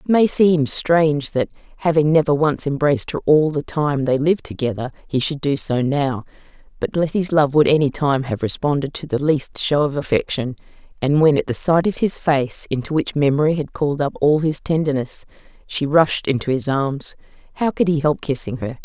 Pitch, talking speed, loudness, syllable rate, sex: 145 Hz, 200 wpm, -19 LUFS, 5.2 syllables/s, female